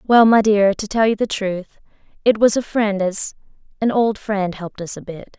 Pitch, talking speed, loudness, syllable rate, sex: 205 Hz, 200 wpm, -18 LUFS, 4.8 syllables/s, female